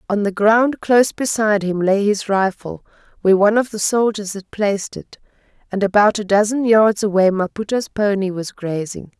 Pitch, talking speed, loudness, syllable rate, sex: 205 Hz, 175 wpm, -17 LUFS, 5.2 syllables/s, female